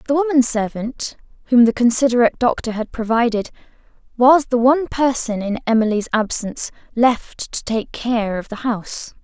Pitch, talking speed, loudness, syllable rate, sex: 235 Hz, 150 wpm, -18 LUFS, 5.1 syllables/s, female